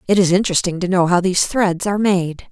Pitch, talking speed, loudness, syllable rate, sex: 185 Hz, 240 wpm, -17 LUFS, 6.5 syllables/s, female